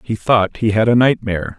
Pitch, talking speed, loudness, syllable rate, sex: 110 Hz, 230 wpm, -15 LUFS, 5.4 syllables/s, male